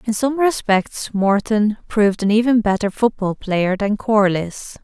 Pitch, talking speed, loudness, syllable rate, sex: 210 Hz, 150 wpm, -18 LUFS, 4.1 syllables/s, female